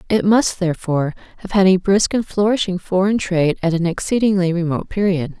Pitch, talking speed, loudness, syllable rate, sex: 185 Hz, 180 wpm, -18 LUFS, 6.0 syllables/s, female